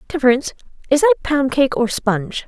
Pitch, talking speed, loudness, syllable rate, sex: 245 Hz, 170 wpm, -17 LUFS, 6.3 syllables/s, female